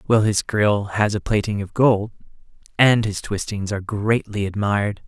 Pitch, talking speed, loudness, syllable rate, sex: 105 Hz, 165 wpm, -20 LUFS, 4.7 syllables/s, male